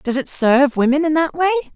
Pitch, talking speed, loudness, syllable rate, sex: 275 Hz, 240 wpm, -16 LUFS, 6.1 syllables/s, female